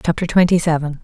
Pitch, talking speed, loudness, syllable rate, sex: 165 Hz, 175 wpm, -16 LUFS, 6.5 syllables/s, female